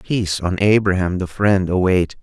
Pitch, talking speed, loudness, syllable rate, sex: 95 Hz, 160 wpm, -18 LUFS, 4.7 syllables/s, male